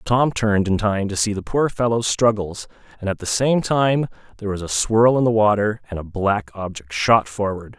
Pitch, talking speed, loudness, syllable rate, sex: 105 Hz, 215 wpm, -20 LUFS, 5.0 syllables/s, male